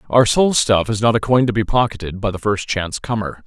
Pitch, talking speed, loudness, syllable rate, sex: 110 Hz, 260 wpm, -17 LUFS, 5.8 syllables/s, male